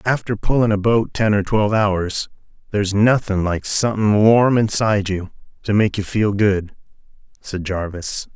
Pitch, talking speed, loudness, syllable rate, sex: 105 Hz, 160 wpm, -18 LUFS, 4.8 syllables/s, male